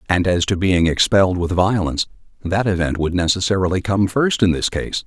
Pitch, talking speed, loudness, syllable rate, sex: 95 Hz, 190 wpm, -18 LUFS, 5.5 syllables/s, male